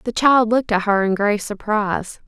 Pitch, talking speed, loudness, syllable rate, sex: 210 Hz, 210 wpm, -18 LUFS, 5.7 syllables/s, female